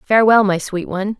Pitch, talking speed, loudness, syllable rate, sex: 205 Hz, 200 wpm, -16 LUFS, 6.1 syllables/s, female